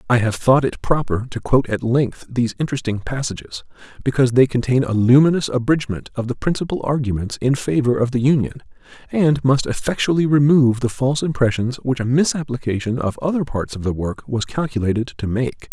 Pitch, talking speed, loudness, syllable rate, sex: 130 Hz, 180 wpm, -19 LUFS, 5.9 syllables/s, male